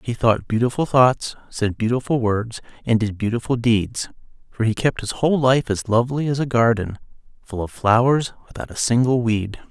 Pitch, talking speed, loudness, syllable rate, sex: 120 Hz, 180 wpm, -20 LUFS, 5.1 syllables/s, male